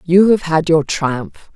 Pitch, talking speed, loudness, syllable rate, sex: 165 Hz, 195 wpm, -15 LUFS, 3.5 syllables/s, female